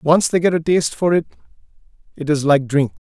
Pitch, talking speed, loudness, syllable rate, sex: 155 Hz, 210 wpm, -18 LUFS, 5.6 syllables/s, male